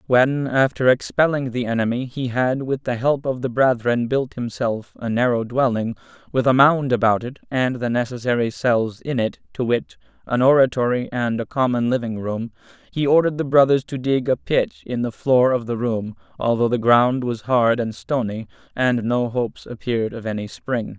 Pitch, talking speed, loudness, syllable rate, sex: 125 Hz, 190 wpm, -20 LUFS, 5.0 syllables/s, male